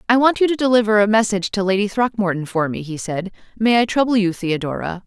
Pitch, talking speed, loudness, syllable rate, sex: 210 Hz, 225 wpm, -18 LUFS, 6.3 syllables/s, female